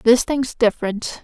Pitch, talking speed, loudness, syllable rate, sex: 235 Hz, 145 wpm, -19 LUFS, 4.5 syllables/s, female